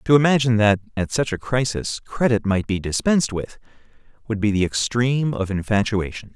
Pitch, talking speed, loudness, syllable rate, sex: 115 Hz, 170 wpm, -21 LUFS, 5.6 syllables/s, male